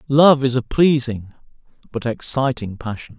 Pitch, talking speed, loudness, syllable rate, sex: 125 Hz, 130 wpm, -19 LUFS, 4.5 syllables/s, male